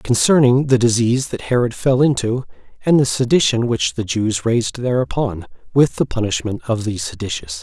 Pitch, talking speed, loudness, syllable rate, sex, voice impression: 115 Hz, 165 wpm, -18 LUFS, 5.3 syllables/s, male, masculine, adult-like, slightly soft, cool, sincere, slightly calm, slightly kind